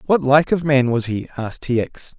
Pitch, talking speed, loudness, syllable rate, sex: 135 Hz, 245 wpm, -19 LUFS, 5.2 syllables/s, male